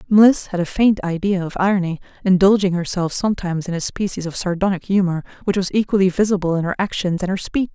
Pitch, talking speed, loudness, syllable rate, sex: 185 Hz, 200 wpm, -19 LUFS, 6.3 syllables/s, female